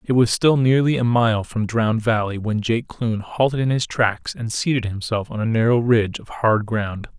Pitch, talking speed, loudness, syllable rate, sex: 115 Hz, 215 wpm, -20 LUFS, 4.9 syllables/s, male